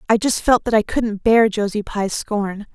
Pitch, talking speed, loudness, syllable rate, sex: 215 Hz, 220 wpm, -18 LUFS, 4.4 syllables/s, female